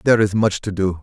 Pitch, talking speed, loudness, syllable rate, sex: 100 Hz, 290 wpm, -18 LUFS, 6.6 syllables/s, male